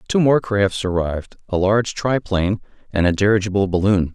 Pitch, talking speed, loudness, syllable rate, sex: 100 Hz, 160 wpm, -19 LUFS, 5.6 syllables/s, male